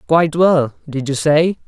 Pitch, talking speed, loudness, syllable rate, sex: 150 Hz, 180 wpm, -16 LUFS, 4.6 syllables/s, male